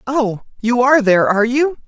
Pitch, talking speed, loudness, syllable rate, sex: 245 Hz, 190 wpm, -15 LUFS, 6.0 syllables/s, female